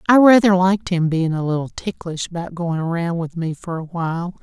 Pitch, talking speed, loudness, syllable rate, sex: 175 Hz, 215 wpm, -19 LUFS, 5.5 syllables/s, female